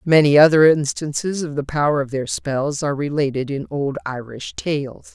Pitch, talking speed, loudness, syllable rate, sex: 145 Hz, 175 wpm, -19 LUFS, 4.8 syllables/s, female